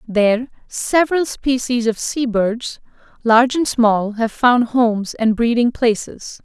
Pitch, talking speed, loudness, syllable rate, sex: 235 Hz, 140 wpm, -17 LUFS, 4.0 syllables/s, female